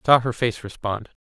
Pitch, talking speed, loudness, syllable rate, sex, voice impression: 115 Hz, 245 wpm, -23 LUFS, 5.3 syllables/s, male, masculine, adult-like, relaxed, slightly powerful, slightly muffled, intellectual, sincere, friendly, lively, slightly strict